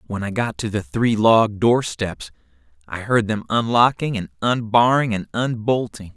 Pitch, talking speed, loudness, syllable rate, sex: 110 Hz, 155 wpm, -19 LUFS, 4.4 syllables/s, male